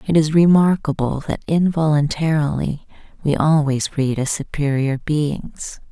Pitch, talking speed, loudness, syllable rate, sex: 150 Hz, 110 wpm, -19 LUFS, 4.2 syllables/s, female